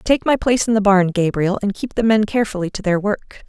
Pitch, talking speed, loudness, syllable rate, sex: 205 Hz, 260 wpm, -18 LUFS, 5.9 syllables/s, female